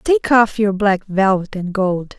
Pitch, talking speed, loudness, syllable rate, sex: 205 Hz, 190 wpm, -16 LUFS, 3.9 syllables/s, female